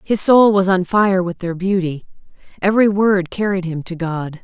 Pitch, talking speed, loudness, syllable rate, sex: 185 Hz, 190 wpm, -16 LUFS, 4.8 syllables/s, female